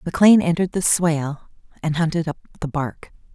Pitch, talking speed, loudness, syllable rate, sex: 160 Hz, 160 wpm, -20 LUFS, 6.1 syllables/s, female